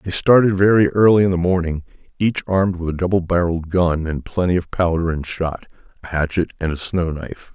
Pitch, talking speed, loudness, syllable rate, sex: 90 Hz, 205 wpm, -18 LUFS, 5.9 syllables/s, male